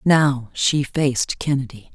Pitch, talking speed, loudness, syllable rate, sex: 130 Hz, 125 wpm, -20 LUFS, 3.9 syllables/s, female